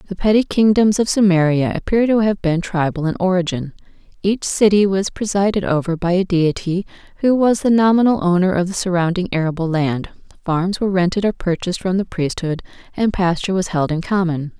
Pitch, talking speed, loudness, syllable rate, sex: 185 Hz, 180 wpm, -17 LUFS, 5.5 syllables/s, female